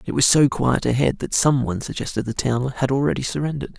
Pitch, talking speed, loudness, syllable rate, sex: 135 Hz, 220 wpm, -21 LUFS, 6.3 syllables/s, male